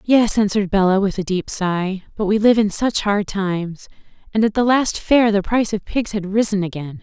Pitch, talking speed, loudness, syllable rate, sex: 205 Hz, 220 wpm, -18 LUFS, 5.2 syllables/s, female